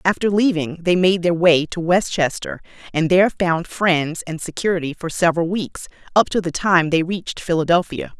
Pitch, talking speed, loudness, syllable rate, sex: 175 Hz, 185 wpm, -19 LUFS, 5.1 syllables/s, female